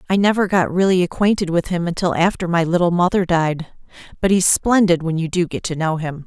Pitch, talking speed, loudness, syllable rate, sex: 175 Hz, 220 wpm, -18 LUFS, 5.7 syllables/s, female